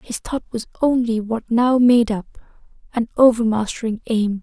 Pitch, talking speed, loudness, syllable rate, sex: 230 Hz, 150 wpm, -19 LUFS, 4.8 syllables/s, female